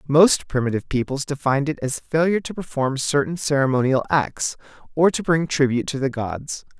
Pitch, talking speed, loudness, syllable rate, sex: 145 Hz, 170 wpm, -21 LUFS, 5.6 syllables/s, male